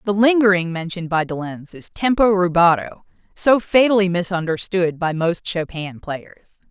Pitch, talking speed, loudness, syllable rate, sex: 180 Hz, 145 wpm, -18 LUFS, 4.7 syllables/s, female